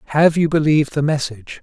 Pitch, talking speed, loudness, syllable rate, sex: 145 Hz, 185 wpm, -17 LUFS, 6.7 syllables/s, male